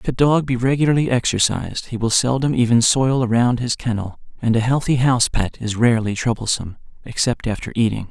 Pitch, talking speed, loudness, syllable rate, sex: 120 Hz, 185 wpm, -19 LUFS, 5.9 syllables/s, male